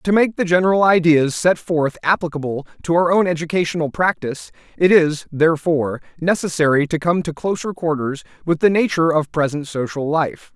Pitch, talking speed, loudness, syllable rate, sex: 165 Hz, 165 wpm, -18 LUFS, 5.5 syllables/s, male